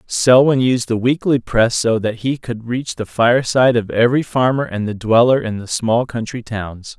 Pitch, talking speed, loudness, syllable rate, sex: 120 Hz, 200 wpm, -16 LUFS, 4.8 syllables/s, male